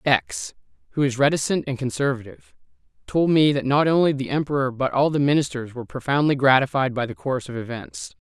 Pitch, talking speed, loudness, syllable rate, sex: 135 Hz, 180 wpm, -22 LUFS, 6.0 syllables/s, male